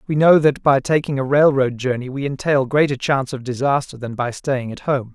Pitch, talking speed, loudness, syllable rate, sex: 135 Hz, 220 wpm, -18 LUFS, 5.4 syllables/s, male